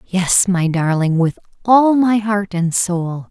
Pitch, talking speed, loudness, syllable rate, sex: 190 Hz, 165 wpm, -16 LUFS, 3.4 syllables/s, female